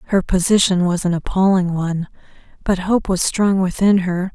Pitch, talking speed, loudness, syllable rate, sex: 185 Hz, 165 wpm, -17 LUFS, 5.1 syllables/s, female